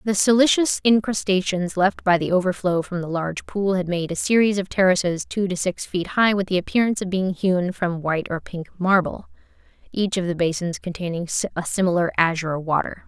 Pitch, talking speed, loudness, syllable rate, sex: 185 Hz, 195 wpm, -21 LUFS, 5.4 syllables/s, female